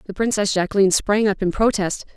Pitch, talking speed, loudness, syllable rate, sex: 200 Hz, 195 wpm, -19 LUFS, 6.2 syllables/s, female